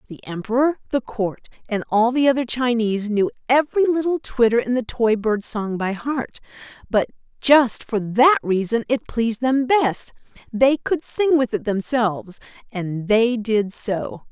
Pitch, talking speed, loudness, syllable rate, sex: 235 Hz, 160 wpm, -20 LUFS, 4.4 syllables/s, female